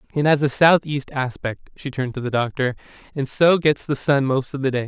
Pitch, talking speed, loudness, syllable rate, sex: 135 Hz, 210 wpm, -20 LUFS, 5.8 syllables/s, male